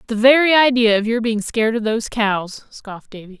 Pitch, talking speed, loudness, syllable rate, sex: 225 Hz, 210 wpm, -16 LUFS, 5.7 syllables/s, female